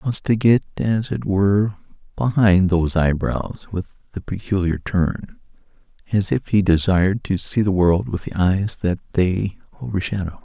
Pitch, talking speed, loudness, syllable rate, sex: 95 Hz, 160 wpm, -20 LUFS, 5.3 syllables/s, male